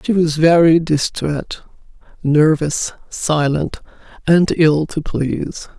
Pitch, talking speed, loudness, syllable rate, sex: 155 Hz, 105 wpm, -16 LUFS, 3.7 syllables/s, female